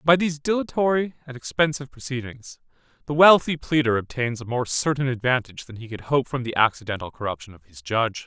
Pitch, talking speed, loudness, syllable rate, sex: 130 Hz, 180 wpm, -22 LUFS, 6.2 syllables/s, male